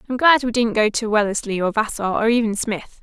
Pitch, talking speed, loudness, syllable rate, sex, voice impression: 220 Hz, 240 wpm, -19 LUFS, 5.6 syllables/s, female, feminine, adult-like, tensed, slightly weak, soft, clear, intellectual, calm, reassuring, kind, modest